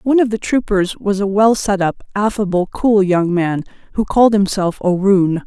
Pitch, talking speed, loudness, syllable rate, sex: 200 Hz, 185 wpm, -16 LUFS, 4.9 syllables/s, female